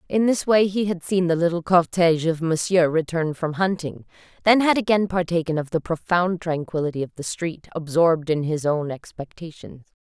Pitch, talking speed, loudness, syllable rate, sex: 170 Hz, 180 wpm, -22 LUFS, 5.2 syllables/s, female